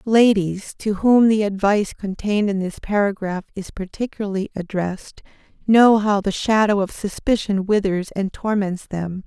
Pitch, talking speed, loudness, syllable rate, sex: 200 Hz, 140 wpm, -20 LUFS, 4.8 syllables/s, female